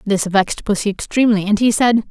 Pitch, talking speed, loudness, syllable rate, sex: 210 Hz, 200 wpm, -16 LUFS, 6.2 syllables/s, female